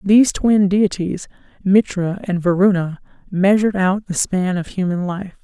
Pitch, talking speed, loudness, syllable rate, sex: 190 Hz, 145 wpm, -18 LUFS, 4.5 syllables/s, female